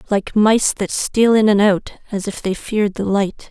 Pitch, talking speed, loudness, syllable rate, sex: 205 Hz, 220 wpm, -17 LUFS, 4.5 syllables/s, female